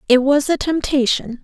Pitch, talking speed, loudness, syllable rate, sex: 270 Hz, 165 wpm, -17 LUFS, 4.8 syllables/s, female